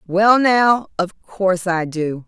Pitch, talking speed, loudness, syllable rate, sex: 195 Hz, 160 wpm, -17 LUFS, 3.4 syllables/s, female